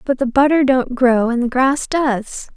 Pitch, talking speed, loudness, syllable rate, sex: 260 Hz, 210 wpm, -16 LUFS, 4.2 syllables/s, female